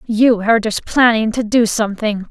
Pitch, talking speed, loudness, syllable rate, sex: 220 Hz, 180 wpm, -15 LUFS, 4.6 syllables/s, female